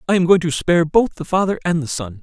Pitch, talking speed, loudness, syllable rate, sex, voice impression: 165 Hz, 295 wpm, -17 LUFS, 6.6 syllables/s, male, very masculine, adult-like, slightly middle-aged, thick, slightly tensed, slightly weak, slightly bright, slightly soft, clear, fluent, cool, very intellectual, refreshing, very sincere, calm, friendly, reassuring, very unique, slightly elegant, slightly wild, sweet, lively, kind, slightly intense, slightly modest, slightly light